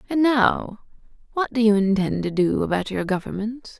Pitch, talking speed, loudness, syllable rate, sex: 220 Hz, 175 wpm, -22 LUFS, 4.8 syllables/s, female